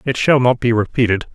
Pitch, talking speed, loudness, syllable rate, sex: 120 Hz, 225 wpm, -16 LUFS, 5.8 syllables/s, male